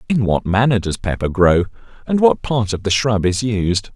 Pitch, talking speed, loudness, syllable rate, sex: 105 Hz, 210 wpm, -17 LUFS, 4.8 syllables/s, male